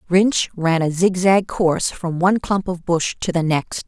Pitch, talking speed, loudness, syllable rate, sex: 180 Hz, 200 wpm, -19 LUFS, 4.4 syllables/s, female